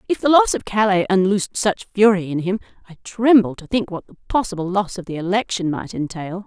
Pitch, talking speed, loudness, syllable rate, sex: 195 Hz, 215 wpm, -19 LUFS, 5.7 syllables/s, female